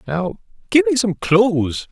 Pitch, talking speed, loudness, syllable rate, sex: 170 Hz, 155 wpm, -17 LUFS, 4.3 syllables/s, male